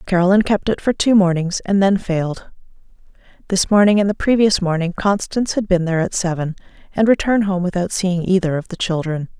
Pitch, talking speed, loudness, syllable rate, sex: 185 Hz, 190 wpm, -17 LUFS, 6.1 syllables/s, female